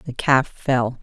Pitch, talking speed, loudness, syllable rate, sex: 125 Hz, 175 wpm, -20 LUFS, 3.1 syllables/s, female